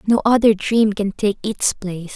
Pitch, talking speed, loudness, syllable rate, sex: 210 Hz, 195 wpm, -18 LUFS, 4.6 syllables/s, female